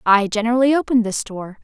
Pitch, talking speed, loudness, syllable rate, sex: 225 Hz, 185 wpm, -18 LUFS, 7.3 syllables/s, female